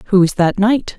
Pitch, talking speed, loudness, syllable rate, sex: 200 Hz, 245 wpm, -14 LUFS, 4.2 syllables/s, female